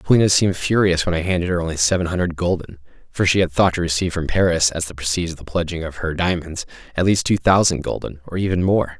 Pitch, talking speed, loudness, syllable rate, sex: 85 Hz, 240 wpm, -19 LUFS, 6.6 syllables/s, male